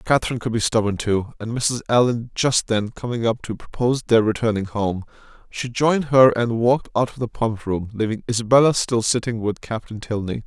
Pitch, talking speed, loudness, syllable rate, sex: 115 Hz, 200 wpm, -21 LUFS, 5.7 syllables/s, male